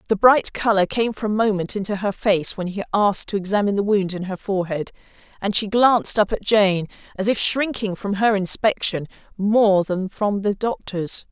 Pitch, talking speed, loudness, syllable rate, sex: 200 Hz, 195 wpm, -20 LUFS, 5.2 syllables/s, female